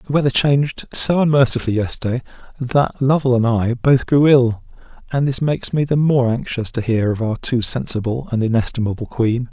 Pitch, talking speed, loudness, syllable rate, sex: 125 Hz, 185 wpm, -18 LUFS, 5.4 syllables/s, male